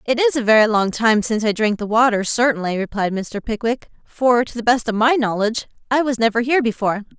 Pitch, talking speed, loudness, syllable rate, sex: 230 Hz, 225 wpm, -18 LUFS, 6.1 syllables/s, female